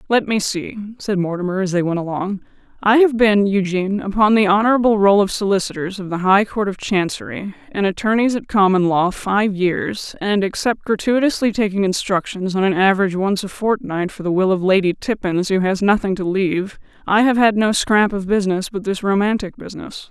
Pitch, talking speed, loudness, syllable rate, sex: 200 Hz, 190 wpm, -18 LUFS, 5.5 syllables/s, female